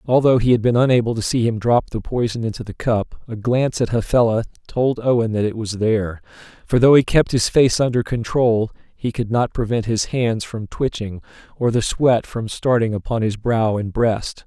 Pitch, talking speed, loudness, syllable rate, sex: 115 Hz, 205 wpm, -19 LUFS, 5.1 syllables/s, male